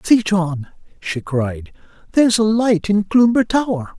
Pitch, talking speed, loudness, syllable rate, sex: 190 Hz, 165 wpm, -17 LUFS, 4.5 syllables/s, male